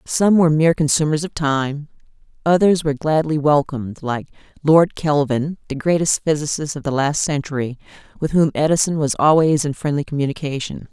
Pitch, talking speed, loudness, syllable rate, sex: 150 Hz, 155 wpm, -18 LUFS, 5.5 syllables/s, female